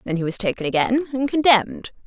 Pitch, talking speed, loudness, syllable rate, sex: 225 Hz, 205 wpm, -20 LUFS, 6.0 syllables/s, female